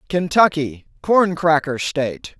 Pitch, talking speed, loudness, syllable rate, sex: 160 Hz, 100 wpm, -18 LUFS, 3.9 syllables/s, male